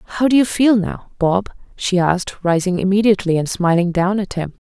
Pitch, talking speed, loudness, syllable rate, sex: 190 Hz, 195 wpm, -17 LUFS, 5.7 syllables/s, female